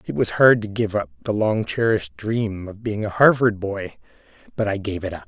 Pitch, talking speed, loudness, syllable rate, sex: 105 Hz, 225 wpm, -21 LUFS, 5.2 syllables/s, male